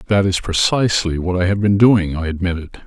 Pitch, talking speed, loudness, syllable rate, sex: 95 Hz, 210 wpm, -17 LUFS, 5.6 syllables/s, male